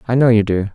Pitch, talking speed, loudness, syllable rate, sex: 110 Hz, 325 wpm, -15 LUFS, 7.0 syllables/s, male